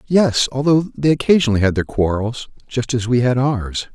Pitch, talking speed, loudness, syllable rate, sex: 125 Hz, 180 wpm, -17 LUFS, 5.1 syllables/s, male